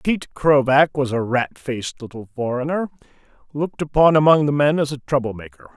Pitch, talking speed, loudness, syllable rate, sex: 140 Hz, 175 wpm, -19 LUFS, 5.9 syllables/s, male